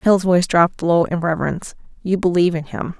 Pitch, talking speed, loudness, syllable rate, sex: 175 Hz, 180 wpm, -18 LUFS, 6.8 syllables/s, female